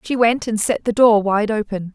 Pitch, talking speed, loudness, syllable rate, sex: 220 Hz, 245 wpm, -17 LUFS, 4.9 syllables/s, female